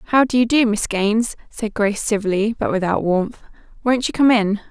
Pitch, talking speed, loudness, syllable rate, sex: 220 Hz, 205 wpm, -19 LUFS, 5.2 syllables/s, female